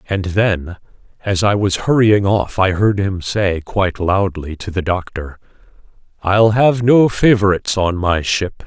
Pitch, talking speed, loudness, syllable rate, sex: 95 Hz, 160 wpm, -16 LUFS, 4.1 syllables/s, male